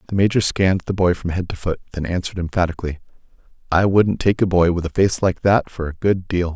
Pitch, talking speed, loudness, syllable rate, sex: 90 Hz, 240 wpm, -19 LUFS, 6.2 syllables/s, male